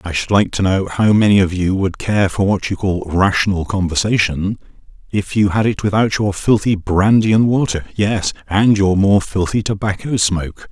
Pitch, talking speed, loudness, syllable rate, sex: 100 Hz, 190 wpm, -16 LUFS, 4.9 syllables/s, male